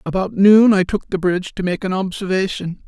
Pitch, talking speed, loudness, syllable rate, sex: 190 Hz, 210 wpm, -17 LUFS, 5.5 syllables/s, male